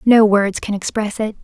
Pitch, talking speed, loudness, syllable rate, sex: 210 Hz, 210 wpm, -17 LUFS, 4.7 syllables/s, female